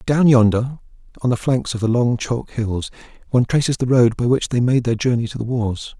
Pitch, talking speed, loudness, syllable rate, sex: 120 Hz, 230 wpm, -19 LUFS, 5.4 syllables/s, male